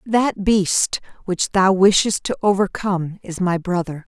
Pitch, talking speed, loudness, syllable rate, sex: 190 Hz, 145 wpm, -19 LUFS, 4.1 syllables/s, female